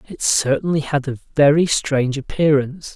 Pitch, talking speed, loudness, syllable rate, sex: 145 Hz, 140 wpm, -18 LUFS, 5.3 syllables/s, male